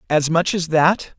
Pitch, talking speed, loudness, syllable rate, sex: 165 Hz, 200 wpm, -18 LUFS, 4.0 syllables/s, male